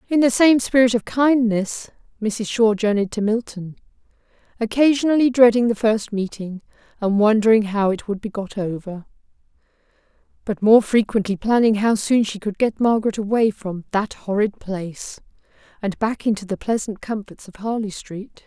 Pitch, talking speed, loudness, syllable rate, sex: 215 Hz, 155 wpm, -19 LUFS, 5.0 syllables/s, female